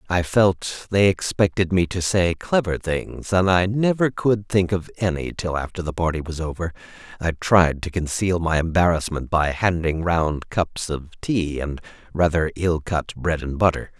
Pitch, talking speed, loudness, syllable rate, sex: 85 Hz, 175 wpm, -22 LUFS, 4.4 syllables/s, male